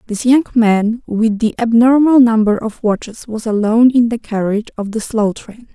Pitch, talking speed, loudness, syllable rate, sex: 225 Hz, 190 wpm, -14 LUFS, 5.0 syllables/s, female